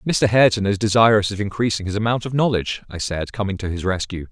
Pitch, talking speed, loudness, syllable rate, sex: 105 Hz, 225 wpm, -20 LUFS, 6.5 syllables/s, male